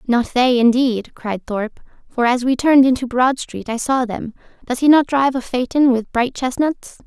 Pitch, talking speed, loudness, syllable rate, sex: 250 Hz, 195 wpm, -17 LUFS, 4.9 syllables/s, female